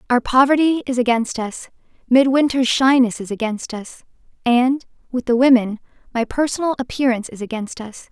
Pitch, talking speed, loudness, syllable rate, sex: 250 Hz, 150 wpm, -18 LUFS, 5.2 syllables/s, female